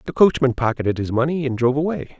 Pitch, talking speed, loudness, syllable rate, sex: 135 Hz, 220 wpm, -20 LUFS, 6.8 syllables/s, male